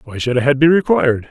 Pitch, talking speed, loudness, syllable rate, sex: 135 Hz, 275 wpm, -14 LUFS, 6.7 syllables/s, male